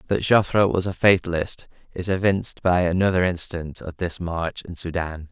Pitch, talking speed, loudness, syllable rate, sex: 90 Hz, 170 wpm, -22 LUFS, 5.2 syllables/s, male